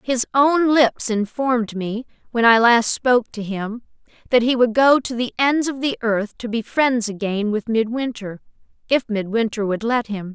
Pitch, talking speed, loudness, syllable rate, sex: 235 Hz, 185 wpm, -19 LUFS, 4.5 syllables/s, female